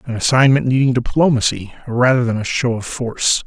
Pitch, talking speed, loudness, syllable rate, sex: 125 Hz, 175 wpm, -16 LUFS, 5.6 syllables/s, male